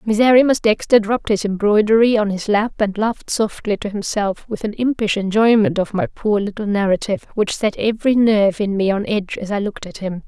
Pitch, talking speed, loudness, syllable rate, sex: 210 Hz, 205 wpm, -18 LUFS, 5.8 syllables/s, female